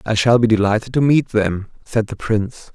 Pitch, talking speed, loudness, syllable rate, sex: 110 Hz, 220 wpm, -17 LUFS, 5.2 syllables/s, male